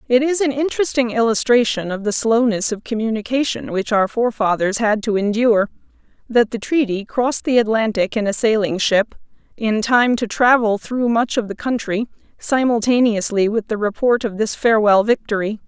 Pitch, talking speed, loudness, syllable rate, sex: 225 Hz, 165 wpm, -18 LUFS, 5.3 syllables/s, female